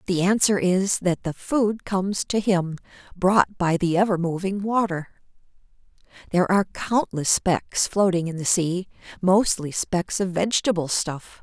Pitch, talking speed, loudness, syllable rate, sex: 185 Hz, 145 wpm, -22 LUFS, 4.3 syllables/s, female